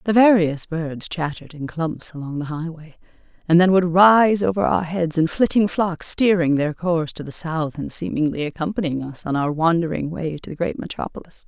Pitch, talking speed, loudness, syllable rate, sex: 165 Hz, 195 wpm, -20 LUFS, 5.2 syllables/s, female